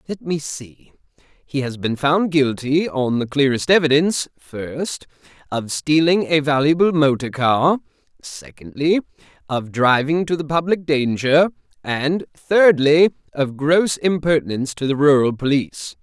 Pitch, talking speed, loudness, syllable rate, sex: 145 Hz, 130 wpm, -18 LUFS, 4.3 syllables/s, male